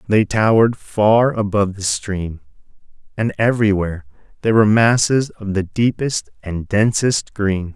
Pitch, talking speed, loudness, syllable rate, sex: 105 Hz, 130 wpm, -17 LUFS, 4.7 syllables/s, male